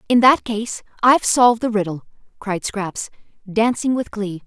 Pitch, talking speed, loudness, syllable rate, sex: 220 Hz, 160 wpm, -19 LUFS, 4.7 syllables/s, female